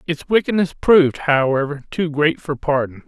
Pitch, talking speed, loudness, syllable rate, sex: 150 Hz, 155 wpm, -18 LUFS, 5.0 syllables/s, male